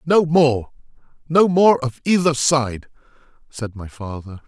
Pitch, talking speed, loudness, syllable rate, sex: 135 Hz, 120 wpm, -18 LUFS, 3.9 syllables/s, male